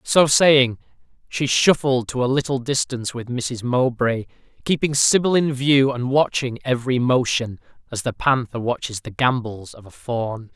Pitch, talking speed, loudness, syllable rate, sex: 125 Hz, 160 wpm, -20 LUFS, 4.6 syllables/s, male